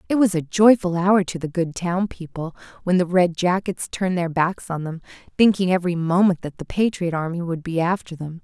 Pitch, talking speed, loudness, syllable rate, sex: 180 Hz, 215 wpm, -21 LUFS, 5.4 syllables/s, female